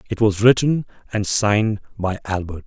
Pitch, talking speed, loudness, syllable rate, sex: 105 Hz, 160 wpm, -20 LUFS, 4.9 syllables/s, male